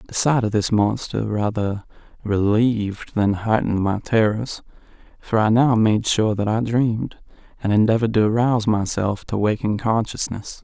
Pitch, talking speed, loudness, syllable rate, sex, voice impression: 110 Hz, 145 wpm, -20 LUFS, 4.8 syllables/s, male, masculine, adult-like, slightly relaxed, slightly weak, slightly dark, soft, slightly raspy, cool, calm, reassuring, wild, slightly kind, slightly modest